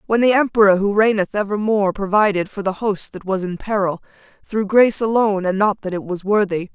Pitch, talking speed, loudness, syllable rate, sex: 205 Hz, 205 wpm, -18 LUFS, 5.9 syllables/s, female